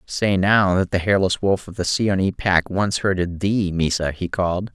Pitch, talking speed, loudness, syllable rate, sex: 95 Hz, 200 wpm, -20 LUFS, 4.5 syllables/s, male